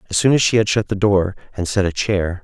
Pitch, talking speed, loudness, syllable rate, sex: 100 Hz, 295 wpm, -18 LUFS, 6.0 syllables/s, male